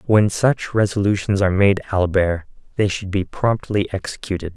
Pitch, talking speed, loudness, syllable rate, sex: 100 Hz, 145 wpm, -19 LUFS, 5.1 syllables/s, male